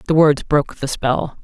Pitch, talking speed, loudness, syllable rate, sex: 145 Hz, 210 wpm, -18 LUFS, 4.9 syllables/s, female